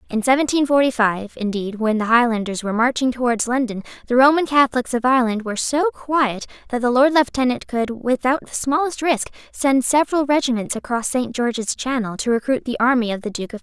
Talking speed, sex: 200 wpm, female